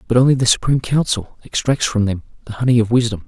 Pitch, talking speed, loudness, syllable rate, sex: 120 Hz, 220 wpm, -17 LUFS, 6.8 syllables/s, male